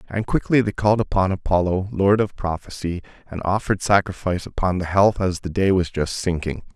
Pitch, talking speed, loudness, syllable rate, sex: 95 Hz, 185 wpm, -21 LUFS, 5.7 syllables/s, male